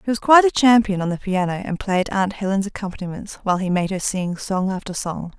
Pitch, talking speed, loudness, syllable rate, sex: 195 Hz, 235 wpm, -20 LUFS, 6.0 syllables/s, female